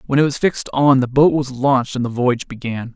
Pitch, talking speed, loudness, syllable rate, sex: 130 Hz, 265 wpm, -17 LUFS, 6.1 syllables/s, male